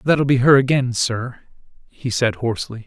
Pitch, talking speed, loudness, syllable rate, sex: 125 Hz, 165 wpm, -18 LUFS, 4.8 syllables/s, male